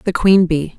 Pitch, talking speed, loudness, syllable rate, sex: 175 Hz, 230 wpm, -14 LUFS, 4.0 syllables/s, female